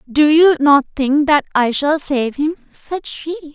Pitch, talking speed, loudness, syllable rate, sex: 295 Hz, 185 wpm, -15 LUFS, 3.9 syllables/s, female